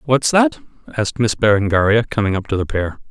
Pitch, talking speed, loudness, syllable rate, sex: 105 Hz, 195 wpm, -17 LUFS, 5.9 syllables/s, male